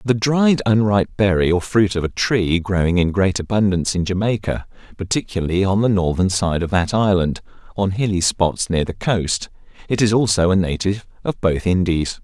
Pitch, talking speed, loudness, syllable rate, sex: 95 Hz, 180 wpm, -18 LUFS, 5.2 syllables/s, male